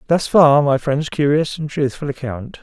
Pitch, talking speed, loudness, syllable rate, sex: 145 Hz, 185 wpm, -17 LUFS, 4.6 syllables/s, male